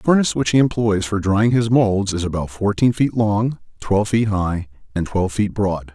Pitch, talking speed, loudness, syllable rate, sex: 105 Hz, 210 wpm, -19 LUFS, 5.2 syllables/s, male